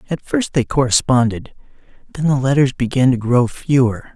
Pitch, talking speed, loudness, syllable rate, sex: 130 Hz, 160 wpm, -16 LUFS, 5.0 syllables/s, male